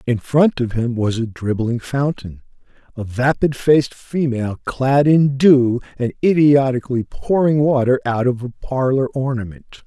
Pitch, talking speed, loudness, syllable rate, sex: 130 Hz, 145 wpm, -17 LUFS, 4.5 syllables/s, male